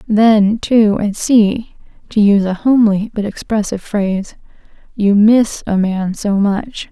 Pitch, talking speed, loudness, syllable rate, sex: 210 Hz, 130 wpm, -14 LUFS, 4.1 syllables/s, female